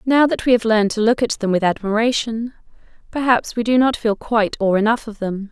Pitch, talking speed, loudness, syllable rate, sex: 225 Hz, 230 wpm, -18 LUFS, 5.8 syllables/s, female